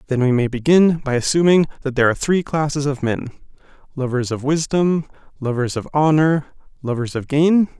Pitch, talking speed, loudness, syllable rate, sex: 140 Hz, 160 wpm, -18 LUFS, 5.6 syllables/s, male